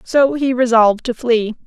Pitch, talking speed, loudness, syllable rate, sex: 245 Hz, 180 wpm, -15 LUFS, 4.7 syllables/s, female